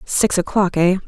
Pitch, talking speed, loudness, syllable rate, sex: 185 Hz, 165 wpm, -17 LUFS, 4.7 syllables/s, female